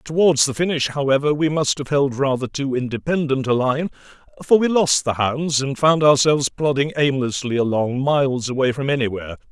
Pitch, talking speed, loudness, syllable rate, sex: 140 Hz, 175 wpm, -19 LUFS, 5.4 syllables/s, male